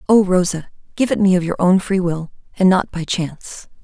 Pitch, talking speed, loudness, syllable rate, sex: 180 Hz, 220 wpm, -17 LUFS, 5.2 syllables/s, female